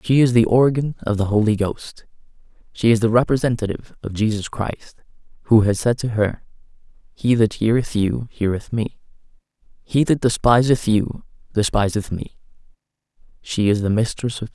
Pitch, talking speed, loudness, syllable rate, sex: 115 Hz, 155 wpm, -19 LUFS, 5.2 syllables/s, male